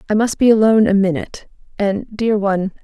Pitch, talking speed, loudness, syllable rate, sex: 205 Hz, 150 wpm, -16 LUFS, 6.2 syllables/s, female